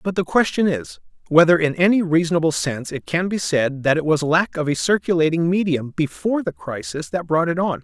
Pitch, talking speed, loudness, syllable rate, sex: 160 Hz, 215 wpm, -19 LUFS, 5.7 syllables/s, male